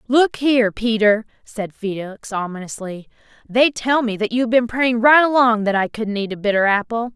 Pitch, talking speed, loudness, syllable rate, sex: 225 Hz, 185 wpm, -18 LUFS, 5.0 syllables/s, female